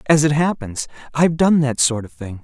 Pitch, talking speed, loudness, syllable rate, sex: 140 Hz, 220 wpm, -18 LUFS, 5.3 syllables/s, male